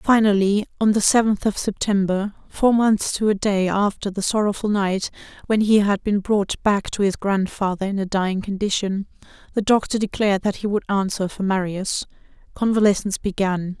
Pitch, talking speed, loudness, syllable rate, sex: 200 Hz, 170 wpm, -21 LUFS, 5.1 syllables/s, female